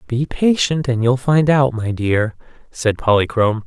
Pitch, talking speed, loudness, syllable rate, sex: 125 Hz, 165 wpm, -17 LUFS, 4.4 syllables/s, male